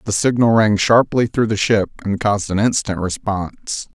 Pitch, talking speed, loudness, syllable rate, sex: 105 Hz, 180 wpm, -17 LUFS, 5.0 syllables/s, male